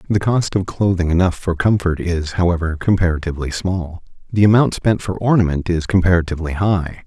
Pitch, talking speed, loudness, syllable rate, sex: 90 Hz, 160 wpm, -18 LUFS, 5.6 syllables/s, male